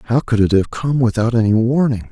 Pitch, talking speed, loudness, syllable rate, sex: 115 Hz, 225 wpm, -16 LUFS, 5.8 syllables/s, male